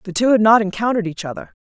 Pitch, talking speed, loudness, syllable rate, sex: 210 Hz, 260 wpm, -16 LUFS, 7.6 syllables/s, female